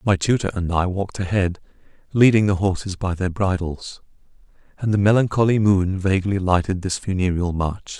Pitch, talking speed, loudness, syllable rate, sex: 95 Hz, 160 wpm, -20 LUFS, 5.3 syllables/s, male